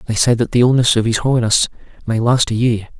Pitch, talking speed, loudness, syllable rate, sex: 115 Hz, 240 wpm, -15 LUFS, 6.1 syllables/s, male